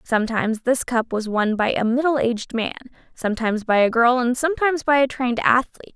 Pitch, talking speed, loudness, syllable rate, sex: 245 Hz, 200 wpm, -20 LUFS, 6.2 syllables/s, female